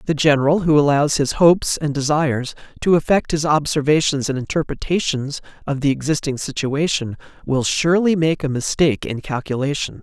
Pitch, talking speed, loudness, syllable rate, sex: 145 Hz, 150 wpm, -19 LUFS, 5.5 syllables/s, male